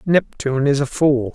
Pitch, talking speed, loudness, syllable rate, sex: 140 Hz, 180 wpm, -18 LUFS, 4.9 syllables/s, male